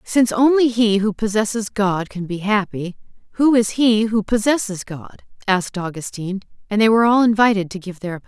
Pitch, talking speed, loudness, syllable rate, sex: 210 Hz, 190 wpm, -18 LUFS, 5.7 syllables/s, female